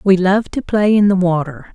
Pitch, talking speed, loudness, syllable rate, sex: 190 Hz, 240 wpm, -15 LUFS, 5.6 syllables/s, female